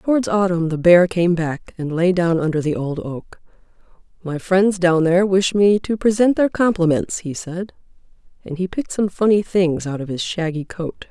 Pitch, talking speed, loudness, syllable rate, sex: 180 Hz, 195 wpm, -18 LUFS, 4.8 syllables/s, female